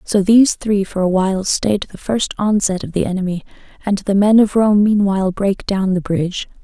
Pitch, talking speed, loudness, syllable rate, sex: 195 Hz, 210 wpm, -16 LUFS, 5.4 syllables/s, female